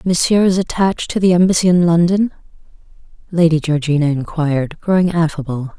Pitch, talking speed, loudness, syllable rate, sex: 170 Hz, 135 wpm, -15 LUFS, 5.8 syllables/s, female